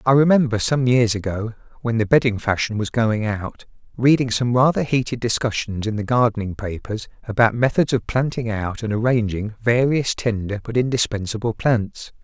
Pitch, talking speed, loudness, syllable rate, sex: 115 Hz, 160 wpm, -20 LUFS, 5.1 syllables/s, male